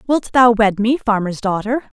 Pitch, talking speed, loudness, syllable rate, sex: 225 Hz, 180 wpm, -16 LUFS, 4.7 syllables/s, female